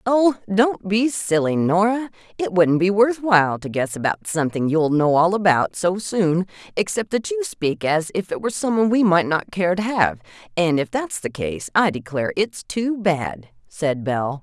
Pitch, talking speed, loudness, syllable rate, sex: 185 Hz, 200 wpm, -20 LUFS, 4.7 syllables/s, female